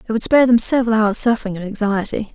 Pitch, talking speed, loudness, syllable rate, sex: 220 Hz, 230 wpm, -16 LUFS, 7.4 syllables/s, female